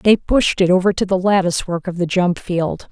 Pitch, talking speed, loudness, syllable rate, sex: 185 Hz, 225 wpm, -17 LUFS, 5.2 syllables/s, female